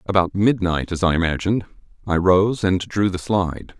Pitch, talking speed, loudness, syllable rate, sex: 95 Hz, 175 wpm, -20 LUFS, 5.9 syllables/s, male